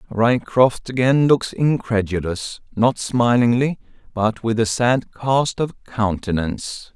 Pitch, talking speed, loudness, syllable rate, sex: 120 Hz, 110 wpm, -19 LUFS, 3.7 syllables/s, male